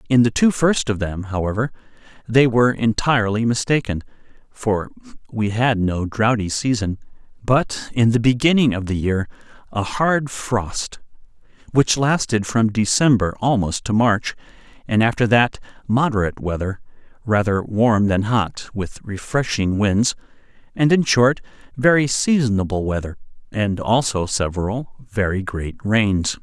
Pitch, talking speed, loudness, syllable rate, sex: 110 Hz, 130 wpm, -19 LUFS, 4.4 syllables/s, male